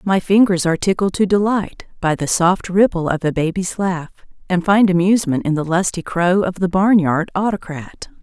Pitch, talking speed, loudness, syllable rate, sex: 180 Hz, 180 wpm, -17 LUFS, 5.1 syllables/s, female